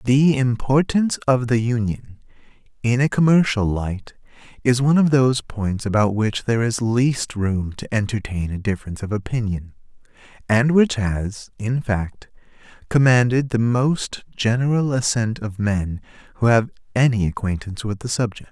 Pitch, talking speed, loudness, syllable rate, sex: 115 Hz, 145 wpm, -20 LUFS, 4.7 syllables/s, male